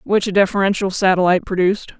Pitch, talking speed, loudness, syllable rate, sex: 195 Hz, 150 wpm, -17 LUFS, 6.9 syllables/s, female